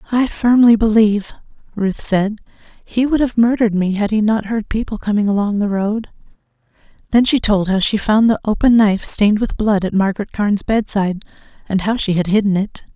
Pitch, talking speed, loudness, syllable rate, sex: 210 Hz, 190 wpm, -16 LUFS, 5.6 syllables/s, female